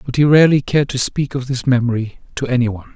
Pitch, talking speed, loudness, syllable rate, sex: 130 Hz, 245 wpm, -16 LUFS, 7.1 syllables/s, male